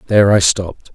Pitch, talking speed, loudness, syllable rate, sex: 95 Hz, 190 wpm, -13 LUFS, 6.7 syllables/s, male